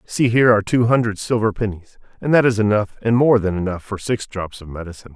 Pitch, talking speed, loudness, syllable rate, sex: 110 Hz, 235 wpm, -18 LUFS, 6.3 syllables/s, male